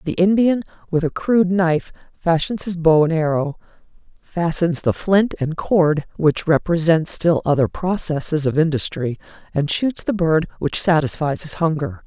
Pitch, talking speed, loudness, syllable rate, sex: 165 Hz, 155 wpm, -19 LUFS, 4.6 syllables/s, female